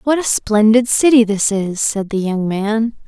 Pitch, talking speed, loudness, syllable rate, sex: 220 Hz, 195 wpm, -15 LUFS, 4.2 syllables/s, female